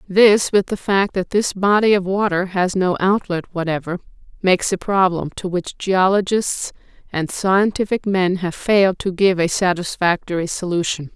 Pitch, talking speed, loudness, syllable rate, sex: 185 Hz, 155 wpm, -18 LUFS, 4.7 syllables/s, female